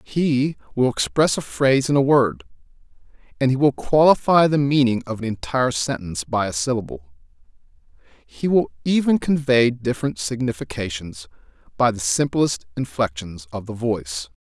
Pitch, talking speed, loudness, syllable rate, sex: 120 Hz, 140 wpm, -20 LUFS, 5.1 syllables/s, male